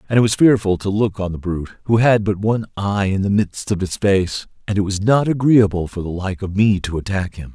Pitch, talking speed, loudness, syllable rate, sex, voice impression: 100 Hz, 260 wpm, -18 LUFS, 5.7 syllables/s, male, masculine, adult-like, slightly thick, cool, sincere, slightly calm